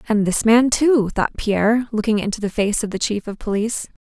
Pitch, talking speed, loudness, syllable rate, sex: 220 Hz, 225 wpm, -19 LUFS, 5.7 syllables/s, female